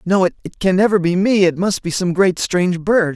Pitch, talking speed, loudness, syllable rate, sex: 185 Hz, 245 wpm, -16 LUFS, 5.3 syllables/s, male